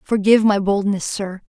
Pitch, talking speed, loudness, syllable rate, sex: 200 Hz, 160 wpm, -18 LUFS, 5.2 syllables/s, female